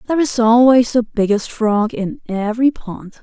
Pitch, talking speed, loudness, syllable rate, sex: 230 Hz, 170 wpm, -15 LUFS, 4.8 syllables/s, female